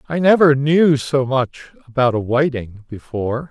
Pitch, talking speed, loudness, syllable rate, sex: 135 Hz, 155 wpm, -17 LUFS, 4.4 syllables/s, male